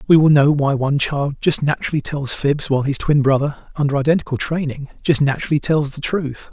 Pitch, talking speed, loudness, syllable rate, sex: 145 Hz, 200 wpm, -18 LUFS, 6.0 syllables/s, male